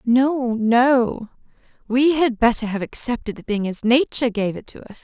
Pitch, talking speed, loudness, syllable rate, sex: 240 Hz, 180 wpm, -19 LUFS, 4.6 syllables/s, female